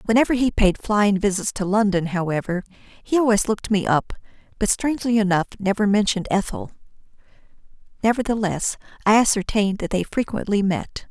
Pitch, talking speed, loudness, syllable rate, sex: 205 Hz, 140 wpm, -21 LUFS, 5.7 syllables/s, female